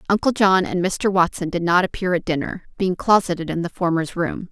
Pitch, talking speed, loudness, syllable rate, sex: 180 Hz, 215 wpm, -20 LUFS, 5.4 syllables/s, female